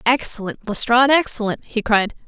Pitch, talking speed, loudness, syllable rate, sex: 230 Hz, 130 wpm, -18 LUFS, 5.7 syllables/s, female